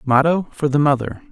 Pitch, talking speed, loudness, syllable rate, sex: 140 Hz, 185 wpm, -18 LUFS, 5.4 syllables/s, male